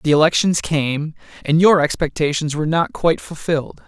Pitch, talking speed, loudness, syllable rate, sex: 155 Hz, 155 wpm, -18 LUFS, 5.4 syllables/s, male